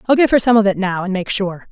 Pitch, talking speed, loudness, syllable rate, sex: 205 Hz, 350 wpm, -16 LUFS, 6.3 syllables/s, female